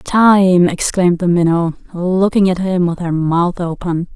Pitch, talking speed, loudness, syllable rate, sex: 180 Hz, 160 wpm, -14 LUFS, 4.1 syllables/s, female